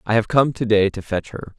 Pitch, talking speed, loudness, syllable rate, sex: 110 Hz, 305 wpm, -19 LUFS, 5.5 syllables/s, male